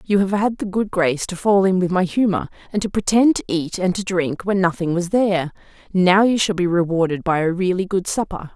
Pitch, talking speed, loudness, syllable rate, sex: 185 Hz, 240 wpm, -19 LUFS, 5.5 syllables/s, female